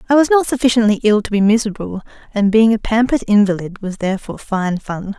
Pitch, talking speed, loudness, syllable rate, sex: 215 Hz, 195 wpm, -16 LUFS, 6.4 syllables/s, female